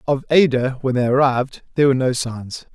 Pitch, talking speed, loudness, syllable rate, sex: 130 Hz, 195 wpm, -18 LUFS, 6.0 syllables/s, male